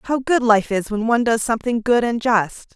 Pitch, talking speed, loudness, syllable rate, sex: 230 Hz, 240 wpm, -18 LUFS, 5.3 syllables/s, female